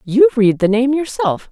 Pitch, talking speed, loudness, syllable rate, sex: 245 Hz, 200 wpm, -15 LUFS, 4.5 syllables/s, female